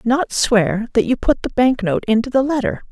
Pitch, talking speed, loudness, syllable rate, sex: 240 Hz, 225 wpm, -17 LUFS, 5.0 syllables/s, female